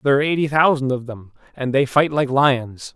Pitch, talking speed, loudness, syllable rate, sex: 135 Hz, 225 wpm, -18 LUFS, 5.7 syllables/s, male